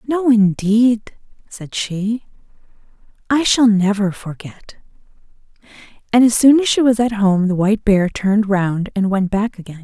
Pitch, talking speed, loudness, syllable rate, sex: 215 Hz, 150 wpm, -16 LUFS, 4.4 syllables/s, female